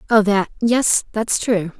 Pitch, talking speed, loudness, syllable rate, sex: 215 Hz, 135 wpm, -18 LUFS, 3.8 syllables/s, female